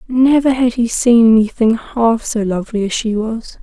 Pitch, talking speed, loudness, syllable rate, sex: 230 Hz, 180 wpm, -14 LUFS, 4.6 syllables/s, female